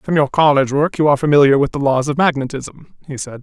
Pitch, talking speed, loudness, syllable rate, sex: 145 Hz, 245 wpm, -15 LUFS, 6.4 syllables/s, male